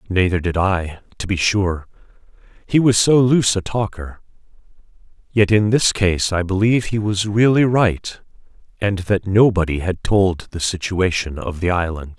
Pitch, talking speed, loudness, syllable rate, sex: 95 Hz, 160 wpm, -18 LUFS, 4.6 syllables/s, male